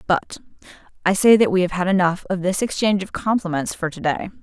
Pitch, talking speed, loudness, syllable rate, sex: 185 Hz, 215 wpm, -20 LUFS, 6.0 syllables/s, female